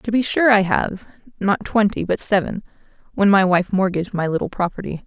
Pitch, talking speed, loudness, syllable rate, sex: 195 Hz, 190 wpm, -19 LUFS, 5.5 syllables/s, female